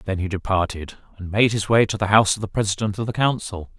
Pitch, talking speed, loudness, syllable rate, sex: 100 Hz, 255 wpm, -21 LUFS, 6.3 syllables/s, male